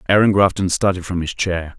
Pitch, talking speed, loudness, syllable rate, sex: 90 Hz, 200 wpm, -18 LUFS, 5.6 syllables/s, male